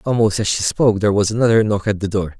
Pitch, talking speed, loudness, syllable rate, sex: 105 Hz, 275 wpm, -17 LUFS, 7.1 syllables/s, male